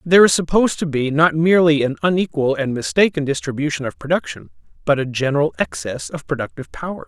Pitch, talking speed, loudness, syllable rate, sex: 140 Hz, 180 wpm, -18 LUFS, 6.4 syllables/s, male